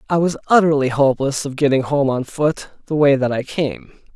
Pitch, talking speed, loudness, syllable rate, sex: 140 Hz, 200 wpm, -18 LUFS, 5.3 syllables/s, male